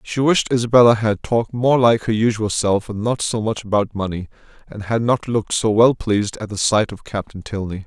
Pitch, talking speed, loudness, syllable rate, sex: 110 Hz, 220 wpm, -18 LUFS, 5.4 syllables/s, male